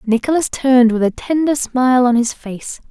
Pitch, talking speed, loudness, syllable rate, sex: 250 Hz, 185 wpm, -15 LUFS, 5.1 syllables/s, female